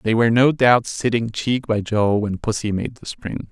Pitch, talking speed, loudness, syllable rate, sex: 110 Hz, 220 wpm, -19 LUFS, 4.6 syllables/s, male